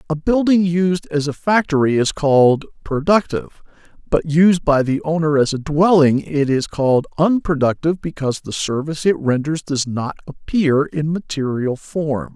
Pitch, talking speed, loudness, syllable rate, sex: 155 Hz, 155 wpm, -18 LUFS, 4.8 syllables/s, male